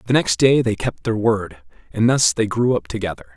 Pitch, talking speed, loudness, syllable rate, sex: 110 Hz, 230 wpm, -19 LUFS, 5.2 syllables/s, male